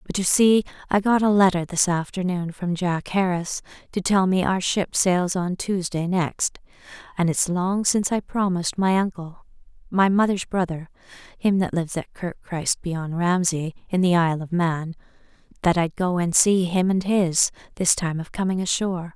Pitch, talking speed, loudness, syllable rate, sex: 180 Hz, 180 wpm, -22 LUFS, 4.9 syllables/s, female